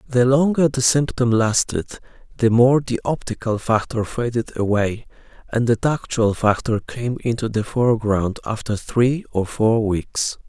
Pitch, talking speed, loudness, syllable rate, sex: 120 Hz, 145 wpm, -20 LUFS, 4.3 syllables/s, male